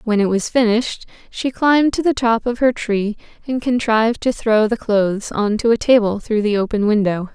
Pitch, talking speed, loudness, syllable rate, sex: 225 Hz, 210 wpm, -17 LUFS, 5.2 syllables/s, female